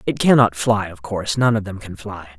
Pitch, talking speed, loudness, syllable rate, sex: 105 Hz, 250 wpm, -18 LUFS, 5.5 syllables/s, male